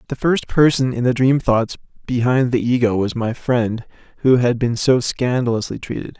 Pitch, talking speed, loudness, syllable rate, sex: 125 Hz, 185 wpm, -18 LUFS, 4.9 syllables/s, male